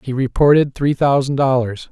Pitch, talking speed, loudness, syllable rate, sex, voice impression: 135 Hz, 155 wpm, -16 LUFS, 5.0 syllables/s, male, masculine, slightly old, slightly thick, sincere, calm, slightly elegant